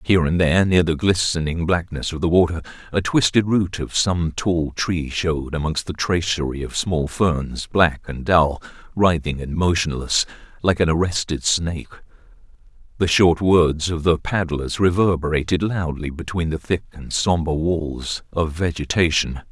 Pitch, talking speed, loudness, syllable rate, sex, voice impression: 85 Hz, 155 wpm, -20 LUFS, 4.6 syllables/s, male, masculine, adult-like, slightly thick, slightly fluent, slightly refreshing, sincere, calm